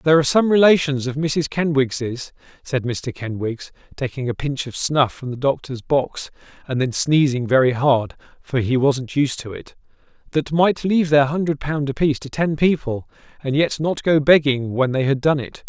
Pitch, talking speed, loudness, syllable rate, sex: 140 Hz, 190 wpm, -19 LUFS, 4.9 syllables/s, male